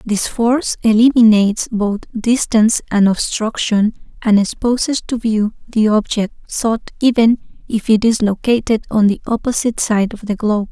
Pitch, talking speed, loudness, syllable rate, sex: 220 Hz, 145 wpm, -15 LUFS, 4.7 syllables/s, female